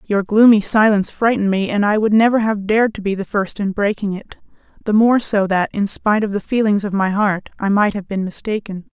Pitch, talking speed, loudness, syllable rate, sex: 205 Hz, 235 wpm, -17 LUFS, 5.7 syllables/s, female